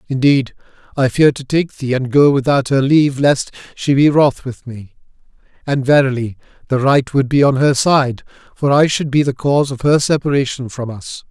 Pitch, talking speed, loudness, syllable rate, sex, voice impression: 135 Hz, 195 wpm, -15 LUFS, 5.1 syllables/s, male, very masculine, slightly old, very thick, tensed, very powerful, bright, slightly soft, clear, slightly fluent, slightly raspy, cool, very intellectual, refreshing, sincere, calm, mature, very friendly, very reassuring, unique, slightly elegant, very wild, slightly sweet, lively, slightly kind, slightly intense, slightly sharp